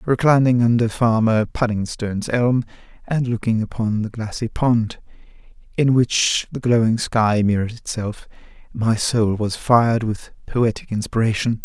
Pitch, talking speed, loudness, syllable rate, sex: 115 Hz, 130 wpm, -19 LUFS, 4.5 syllables/s, male